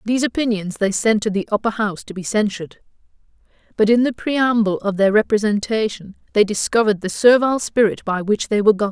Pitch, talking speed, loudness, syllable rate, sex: 215 Hz, 190 wpm, -18 LUFS, 6.4 syllables/s, female